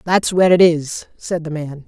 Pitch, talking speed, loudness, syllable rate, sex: 165 Hz, 225 wpm, -16 LUFS, 4.8 syllables/s, female